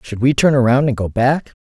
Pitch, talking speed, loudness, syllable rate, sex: 125 Hz, 260 wpm, -15 LUFS, 5.5 syllables/s, male